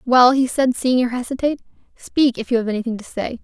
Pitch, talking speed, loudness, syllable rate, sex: 245 Hz, 225 wpm, -19 LUFS, 6.1 syllables/s, female